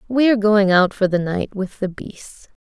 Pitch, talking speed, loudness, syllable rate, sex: 200 Hz, 230 wpm, -18 LUFS, 4.7 syllables/s, female